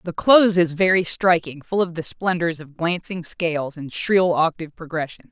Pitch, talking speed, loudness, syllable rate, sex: 170 Hz, 180 wpm, -20 LUFS, 5.0 syllables/s, female